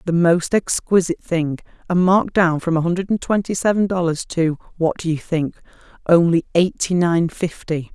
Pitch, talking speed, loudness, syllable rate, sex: 175 Hz, 160 wpm, -19 LUFS, 5.1 syllables/s, female